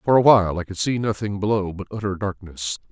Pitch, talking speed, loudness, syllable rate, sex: 100 Hz, 225 wpm, -22 LUFS, 6.1 syllables/s, male